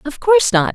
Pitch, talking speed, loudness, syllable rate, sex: 295 Hz, 240 wpm, -14 LUFS, 6.3 syllables/s, female